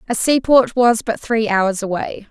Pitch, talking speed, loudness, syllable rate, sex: 225 Hz, 185 wpm, -16 LUFS, 4.3 syllables/s, female